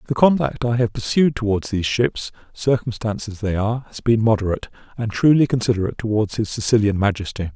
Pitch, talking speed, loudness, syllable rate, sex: 110 Hz, 175 wpm, -20 LUFS, 6.3 syllables/s, male